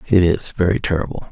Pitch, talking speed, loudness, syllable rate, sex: 90 Hz, 180 wpm, -18 LUFS, 6.0 syllables/s, male